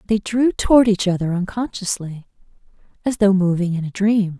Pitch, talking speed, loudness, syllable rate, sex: 200 Hz, 165 wpm, -19 LUFS, 5.3 syllables/s, female